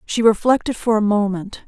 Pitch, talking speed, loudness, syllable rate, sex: 215 Hz, 180 wpm, -18 LUFS, 5.1 syllables/s, female